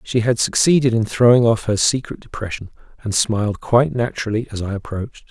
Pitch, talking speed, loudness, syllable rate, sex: 115 Hz, 180 wpm, -18 LUFS, 6.0 syllables/s, male